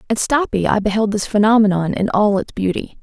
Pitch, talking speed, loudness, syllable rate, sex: 210 Hz, 200 wpm, -17 LUFS, 5.7 syllables/s, female